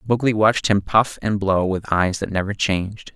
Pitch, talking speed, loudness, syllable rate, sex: 100 Hz, 210 wpm, -20 LUFS, 5.1 syllables/s, male